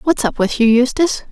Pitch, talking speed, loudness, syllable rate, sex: 255 Hz, 230 wpm, -15 LUFS, 5.7 syllables/s, female